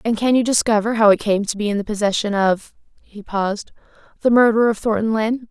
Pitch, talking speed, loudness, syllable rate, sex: 215 Hz, 220 wpm, -18 LUFS, 6.3 syllables/s, female